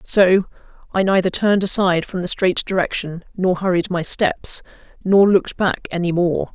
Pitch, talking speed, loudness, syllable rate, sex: 185 Hz, 165 wpm, -18 LUFS, 4.9 syllables/s, female